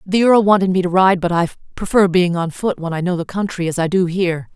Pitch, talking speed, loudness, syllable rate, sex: 180 Hz, 275 wpm, -17 LUFS, 6.0 syllables/s, female